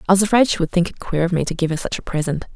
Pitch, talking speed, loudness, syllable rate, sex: 175 Hz, 375 wpm, -19 LUFS, 7.6 syllables/s, female